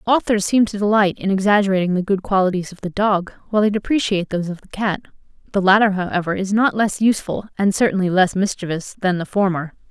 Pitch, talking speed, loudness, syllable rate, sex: 195 Hz, 200 wpm, -19 LUFS, 6.4 syllables/s, female